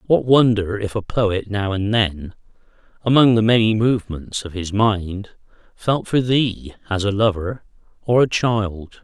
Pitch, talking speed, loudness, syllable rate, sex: 105 Hz, 160 wpm, -19 LUFS, 4.1 syllables/s, male